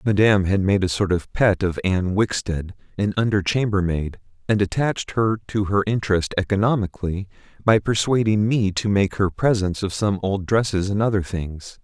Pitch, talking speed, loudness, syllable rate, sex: 100 Hz, 165 wpm, -21 LUFS, 5.2 syllables/s, male